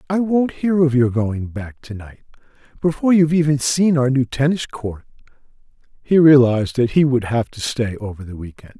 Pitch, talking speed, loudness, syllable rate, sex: 135 Hz, 190 wpm, -17 LUFS, 5.3 syllables/s, male